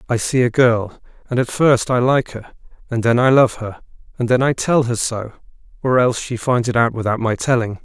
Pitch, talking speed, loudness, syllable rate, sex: 120 Hz, 215 wpm, -17 LUFS, 5.3 syllables/s, male